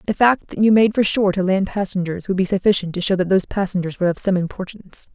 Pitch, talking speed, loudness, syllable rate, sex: 190 Hz, 255 wpm, -19 LUFS, 6.8 syllables/s, female